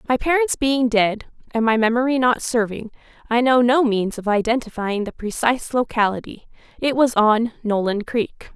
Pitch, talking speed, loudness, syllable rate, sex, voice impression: 235 Hz, 160 wpm, -20 LUFS, 4.9 syllables/s, female, feminine, adult-like, tensed, slightly powerful, slightly bright, clear, fluent, intellectual, friendly, lively, slightly intense, sharp